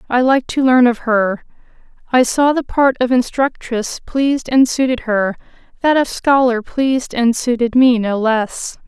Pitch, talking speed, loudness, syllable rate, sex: 245 Hz, 170 wpm, -15 LUFS, 4.5 syllables/s, female